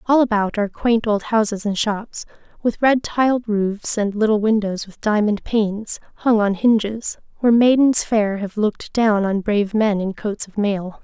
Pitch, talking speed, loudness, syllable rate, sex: 215 Hz, 185 wpm, -19 LUFS, 4.7 syllables/s, female